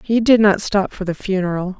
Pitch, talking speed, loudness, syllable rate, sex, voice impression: 195 Hz, 235 wpm, -17 LUFS, 5.3 syllables/s, female, very feminine, adult-like, slightly middle-aged, very thin, slightly relaxed, slightly weak, slightly dark, slightly hard, clear, slightly fluent, slightly cute, intellectual, slightly refreshing, sincere, slightly calm, reassuring, very elegant, slightly wild, sweet, slightly lively, very kind, modest